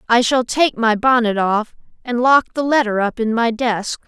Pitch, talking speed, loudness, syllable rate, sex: 235 Hz, 205 wpm, -17 LUFS, 4.6 syllables/s, female